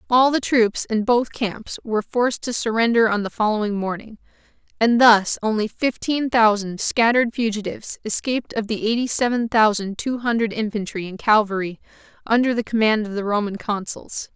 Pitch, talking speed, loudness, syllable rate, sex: 220 Hz, 165 wpm, -20 LUFS, 5.3 syllables/s, female